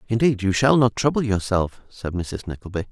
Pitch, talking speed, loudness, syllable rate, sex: 105 Hz, 185 wpm, -22 LUFS, 5.3 syllables/s, male